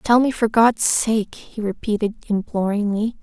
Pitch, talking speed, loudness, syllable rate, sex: 215 Hz, 150 wpm, -20 LUFS, 4.4 syllables/s, female